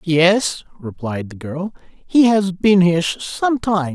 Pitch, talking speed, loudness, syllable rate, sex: 180 Hz, 150 wpm, -17 LUFS, 3.3 syllables/s, male